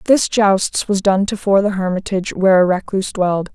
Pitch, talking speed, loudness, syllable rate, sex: 195 Hz, 205 wpm, -16 LUFS, 5.7 syllables/s, female